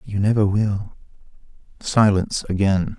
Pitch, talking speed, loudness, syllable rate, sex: 100 Hz, 100 wpm, -20 LUFS, 4.4 syllables/s, male